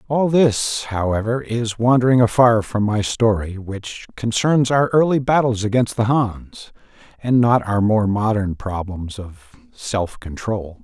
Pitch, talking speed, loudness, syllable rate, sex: 110 Hz, 145 wpm, -18 LUFS, 4.0 syllables/s, male